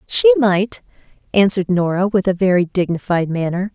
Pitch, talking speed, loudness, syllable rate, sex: 185 Hz, 145 wpm, -17 LUFS, 5.1 syllables/s, female